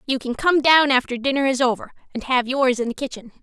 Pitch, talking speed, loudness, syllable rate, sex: 260 Hz, 245 wpm, -19 LUFS, 6.1 syllables/s, female